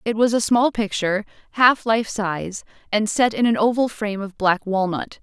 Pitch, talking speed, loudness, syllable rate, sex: 215 Hz, 185 wpm, -20 LUFS, 4.9 syllables/s, female